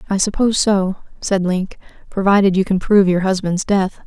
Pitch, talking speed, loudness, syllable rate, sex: 195 Hz, 175 wpm, -16 LUFS, 5.5 syllables/s, female